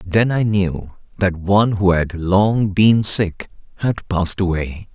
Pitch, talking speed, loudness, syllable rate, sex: 95 Hz, 160 wpm, -17 LUFS, 3.8 syllables/s, male